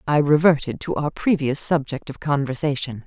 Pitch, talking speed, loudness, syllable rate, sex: 145 Hz, 155 wpm, -21 LUFS, 5.1 syllables/s, female